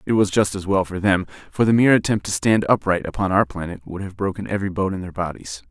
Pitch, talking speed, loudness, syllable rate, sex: 95 Hz, 265 wpm, -21 LUFS, 6.4 syllables/s, male